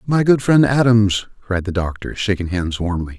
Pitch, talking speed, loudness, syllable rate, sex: 100 Hz, 190 wpm, -18 LUFS, 4.8 syllables/s, male